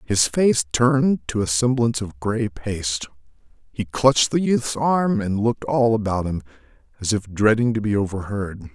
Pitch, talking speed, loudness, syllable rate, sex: 110 Hz, 170 wpm, -21 LUFS, 4.8 syllables/s, male